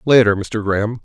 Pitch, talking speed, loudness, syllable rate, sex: 110 Hz, 175 wpm, -17 LUFS, 5.8 syllables/s, male